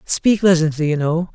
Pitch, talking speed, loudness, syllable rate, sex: 165 Hz, 180 wpm, -17 LUFS, 4.8 syllables/s, male